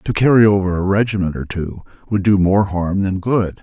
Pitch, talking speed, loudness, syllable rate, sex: 95 Hz, 215 wpm, -16 LUFS, 5.1 syllables/s, male